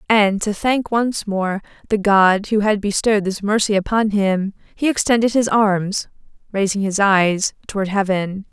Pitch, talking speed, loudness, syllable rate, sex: 205 Hz, 160 wpm, -18 LUFS, 4.4 syllables/s, female